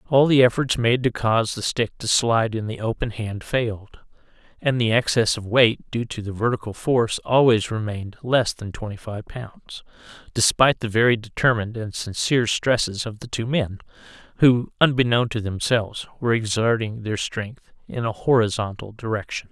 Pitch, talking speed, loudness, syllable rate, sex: 115 Hz, 170 wpm, -22 LUFS, 5.2 syllables/s, male